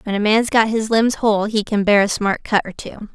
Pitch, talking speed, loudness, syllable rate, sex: 210 Hz, 285 wpm, -17 LUFS, 5.3 syllables/s, female